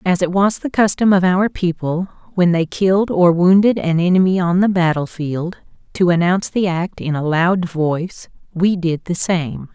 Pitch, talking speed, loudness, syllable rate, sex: 180 Hz, 190 wpm, -16 LUFS, 4.7 syllables/s, female